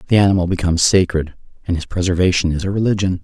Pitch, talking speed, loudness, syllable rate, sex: 90 Hz, 185 wpm, -17 LUFS, 7.3 syllables/s, male